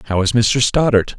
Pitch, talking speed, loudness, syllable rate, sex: 115 Hz, 200 wpm, -15 LUFS, 4.4 syllables/s, male